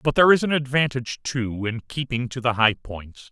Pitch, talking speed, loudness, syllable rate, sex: 130 Hz, 215 wpm, -22 LUFS, 5.5 syllables/s, male